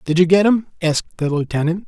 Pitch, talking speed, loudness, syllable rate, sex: 170 Hz, 225 wpm, -17 LUFS, 6.9 syllables/s, male